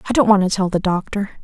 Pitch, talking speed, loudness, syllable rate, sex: 195 Hz, 295 wpm, -17 LUFS, 7.1 syllables/s, female